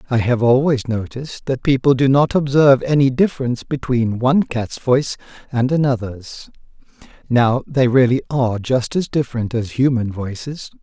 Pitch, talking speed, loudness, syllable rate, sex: 125 Hz, 150 wpm, -17 LUFS, 5.2 syllables/s, male